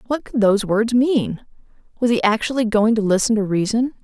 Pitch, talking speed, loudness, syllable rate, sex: 225 Hz, 180 wpm, -18 LUFS, 5.6 syllables/s, female